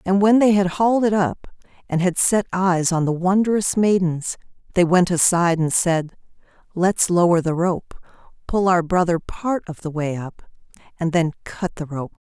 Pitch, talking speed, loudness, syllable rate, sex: 180 Hz, 180 wpm, -20 LUFS, 4.6 syllables/s, female